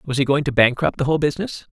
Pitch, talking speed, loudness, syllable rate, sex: 140 Hz, 275 wpm, -19 LUFS, 7.2 syllables/s, male